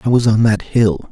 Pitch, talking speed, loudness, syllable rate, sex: 110 Hz, 270 wpm, -14 LUFS, 5.4 syllables/s, male